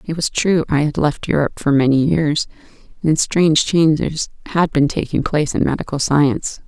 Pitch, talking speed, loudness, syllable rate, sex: 150 Hz, 180 wpm, -17 LUFS, 5.2 syllables/s, female